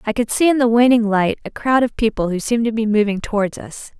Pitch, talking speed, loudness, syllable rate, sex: 225 Hz, 270 wpm, -17 LUFS, 6.1 syllables/s, female